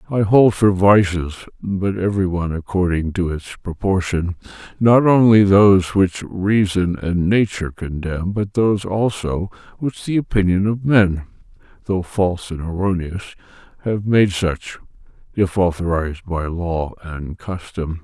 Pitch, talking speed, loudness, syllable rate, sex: 95 Hz, 135 wpm, -18 LUFS, 3.7 syllables/s, male